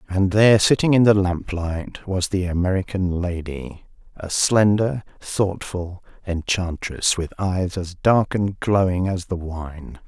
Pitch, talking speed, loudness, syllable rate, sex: 95 Hz, 130 wpm, -21 LUFS, 3.9 syllables/s, male